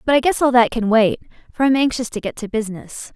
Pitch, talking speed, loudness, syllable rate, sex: 235 Hz, 265 wpm, -18 LUFS, 6.3 syllables/s, female